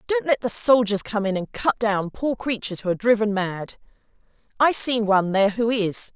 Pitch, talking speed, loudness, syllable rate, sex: 220 Hz, 205 wpm, -21 LUFS, 5.4 syllables/s, female